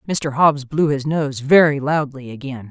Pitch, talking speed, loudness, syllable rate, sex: 140 Hz, 180 wpm, -17 LUFS, 4.3 syllables/s, female